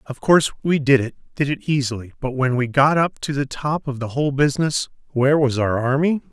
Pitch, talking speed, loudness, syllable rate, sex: 140 Hz, 220 wpm, -20 LUFS, 5.7 syllables/s, male